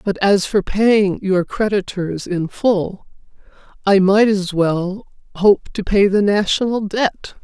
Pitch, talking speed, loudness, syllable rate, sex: 200 Hz, 145 wpm, -17 LUFS, 3.6 syllables/s, female